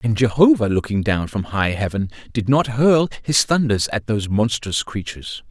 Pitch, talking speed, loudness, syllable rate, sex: 115 Hz, 175 wpm, -19 LUFS, 5.0 syllables/s, male